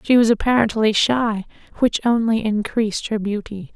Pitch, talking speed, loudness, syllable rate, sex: 220 Hz, 145 wpm, -19 LUFS, 4.9 syllables/s, female